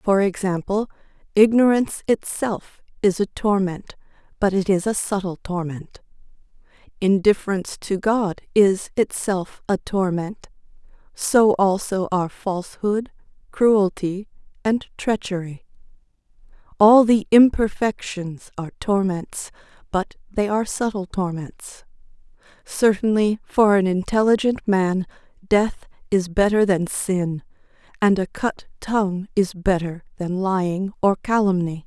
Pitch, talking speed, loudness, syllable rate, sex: 195 Hz, 105 wpm, -21 LUFS, 4.3 syllables/s, female